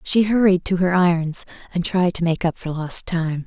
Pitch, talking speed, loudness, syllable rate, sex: 175 Hz, 225 wpm, -20 LUFS, 4.8 syllables/s, female